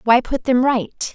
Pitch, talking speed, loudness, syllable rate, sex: 245 Hz, 210 wpm, -18 LUFS, 3.8 syllables/s, female